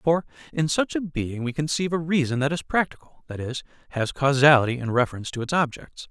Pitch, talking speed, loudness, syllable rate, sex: 145 Hz, 205 wpm, -24 LUFS, 6.1 syllables/s, male